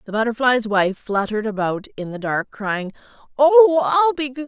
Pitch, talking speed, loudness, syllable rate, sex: 215 Hz, 175 wpm, -19 LUFS, 4.7 syllables/s, female